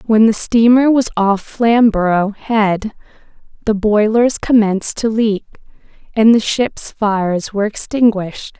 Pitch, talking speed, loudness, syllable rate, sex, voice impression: 215 Hz, 125 wpm, -14 LUFS, 4.1 syllables/s, female, feminine, slightly young, powerful, bright, soft, cute, calm, friendly, kind, slightly modest